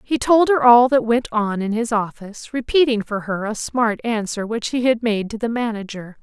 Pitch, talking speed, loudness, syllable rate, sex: 230 Hz, 220 wpm, -19 LUFS, 4.9 syllables/s, female